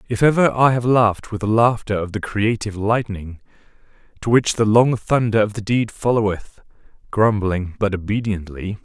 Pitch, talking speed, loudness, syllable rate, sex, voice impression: 110 Hz, 165 wpm, -19 LUFS, 5.2 syllables/s, male, very masculine, adult-like, cool, sincere